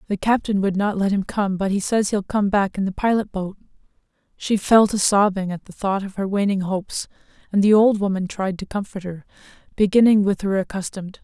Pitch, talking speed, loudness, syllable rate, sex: 200 Hz, 215 wpm, -20 LUFS, 5.6 syllables/s, female